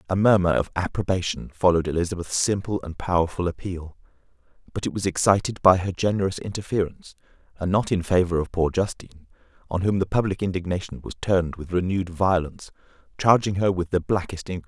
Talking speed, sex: 170 wpm, male